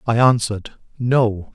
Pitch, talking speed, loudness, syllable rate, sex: 115 Hz, 115 wpm, -18 LUFS, 4.1 syllables/s, male